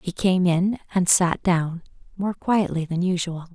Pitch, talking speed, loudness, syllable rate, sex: 180 Hz, 170 wpm, -22 LUFS, 4.1 syllables/s, female